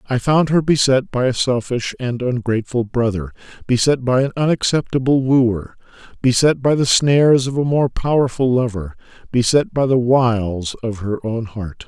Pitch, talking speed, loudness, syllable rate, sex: 125 Hz, 160 wpm, -17 LUFS, 4.8 syllables/s, male